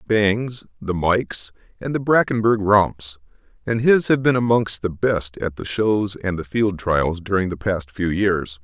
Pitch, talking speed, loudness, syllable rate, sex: 100 Hz, 180 wpm, -20 LUFS, 4.1 syllables/s, male